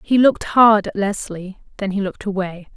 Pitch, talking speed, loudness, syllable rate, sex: 200 Hz, 195 wpm, -18 LUFS, 5.3 syllables/s, female